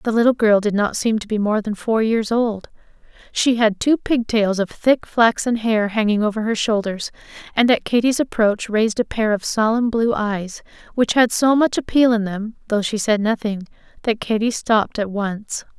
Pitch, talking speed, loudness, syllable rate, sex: 220 Hz, 200 wpm, -19 LUFS, 4.8 syllables/s, female